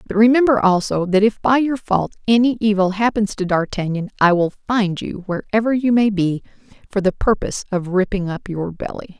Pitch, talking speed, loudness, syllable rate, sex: 205 Hz, 190 wpm, -18 LUFS, 5.3 syllables/s, female